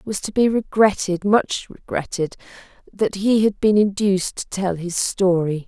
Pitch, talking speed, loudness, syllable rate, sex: 195 Hz, 150 wpm, -20 LUFS, 4.6 syllables/s, female